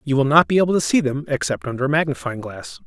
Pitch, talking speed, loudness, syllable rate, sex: 140 Hz, 270 wpm, -19 LUFS, 6.6 syllables/s, male